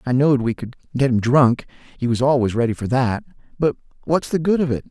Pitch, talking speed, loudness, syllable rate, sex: 130 Hz, 210 wpm, -20 LUFS, 6.1 syllables/s, male